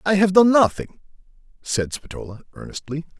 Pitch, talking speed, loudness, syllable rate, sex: 170 Hz, 130 wpm, -19 LUFS, 5.4 syllables/s, male